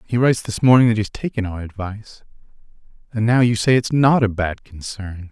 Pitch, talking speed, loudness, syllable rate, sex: 110 Hz, 205 wpm, -18 LUFS, 5.6 syllables/s, male